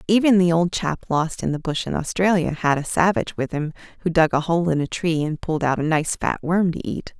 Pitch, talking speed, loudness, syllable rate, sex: 165 Hz, 260 wpm, -21 LUFS, 5.6 syllables/s, female